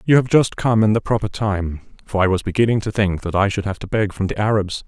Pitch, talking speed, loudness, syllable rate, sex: 105 Hz, 285 wpm, -19 LUFS, 6.0 syllables/s, male